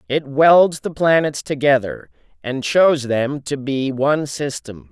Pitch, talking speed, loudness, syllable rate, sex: 140 Hz, 145 wpm, -17 LUFS, 3.9 syllables/s, male